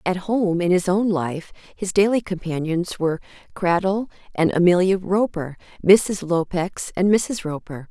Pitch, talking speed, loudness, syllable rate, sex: 180 Hz, 145 wpm, -21 LUFS, 4.4 syllables/s, female